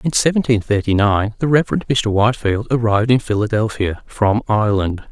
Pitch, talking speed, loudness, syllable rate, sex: 110 Hz, 155 wpm, -17 LUFS, 5.6 syllables/s, male